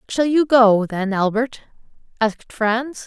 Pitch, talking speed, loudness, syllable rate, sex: 235 Hz, 135 wpm, -18 LUFS, 4.0 syllables/s, female